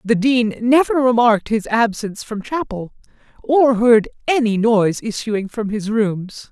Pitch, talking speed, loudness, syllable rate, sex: 225 Hz, 145 wpm, -17 LUFS, 4.4 syllables/s, male